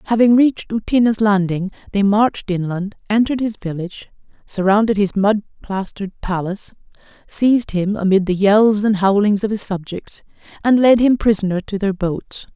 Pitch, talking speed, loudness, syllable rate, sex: 205 Hz, 155 wpm, -17 LUFS, 5.2 syllables/s, female